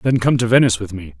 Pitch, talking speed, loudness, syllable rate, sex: 110 Hz, 300 wpm, -16 LUFS, 7.4 syllables/s, male